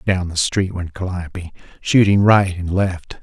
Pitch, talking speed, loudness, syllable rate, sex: 90 Hz, 170 wpm, -18 LUFS, 4.3 syllables/s, male